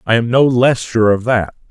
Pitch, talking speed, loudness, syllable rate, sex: 120 Hz, 245 wpm, -14 LUFS, 4.8 syllables/s, male